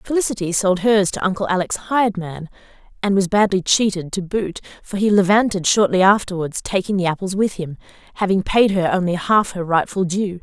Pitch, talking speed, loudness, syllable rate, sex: 190 Hz, 180 wpm, -18 LUFS, 5.4 syllables/s, female